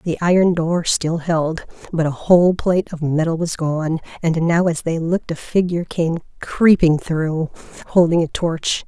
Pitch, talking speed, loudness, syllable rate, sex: 165 Hz, 175 wpm, -18 LUFS, 4.6 syllables/s, female